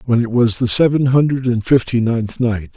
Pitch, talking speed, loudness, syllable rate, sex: 120 Hz, 215 wpm, -16 LUFS, 5.0 syllables/s, male